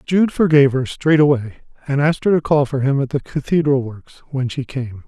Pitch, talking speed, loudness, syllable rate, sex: 140 Hz, 215 wpm, -17 LUFS, 5.6 syllables/s, male